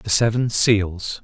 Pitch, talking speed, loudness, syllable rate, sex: 105 Hz, 145 wpm, -19 LUFS, 3.4 syllables/s, male